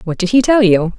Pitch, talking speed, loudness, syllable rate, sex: 205 Hz, 305 wpm, -12 LUFS, 6.0 syllables/s, female